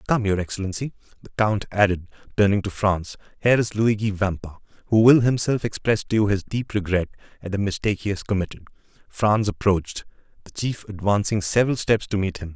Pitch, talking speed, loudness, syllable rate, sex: 100 Hz, 180 wpm, -22 LUFS, 6.0 syllables/s, male